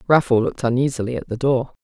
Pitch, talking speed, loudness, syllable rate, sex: 125 Hz, 195 wpm, -20 LUFS, 6.8 syllables/s, female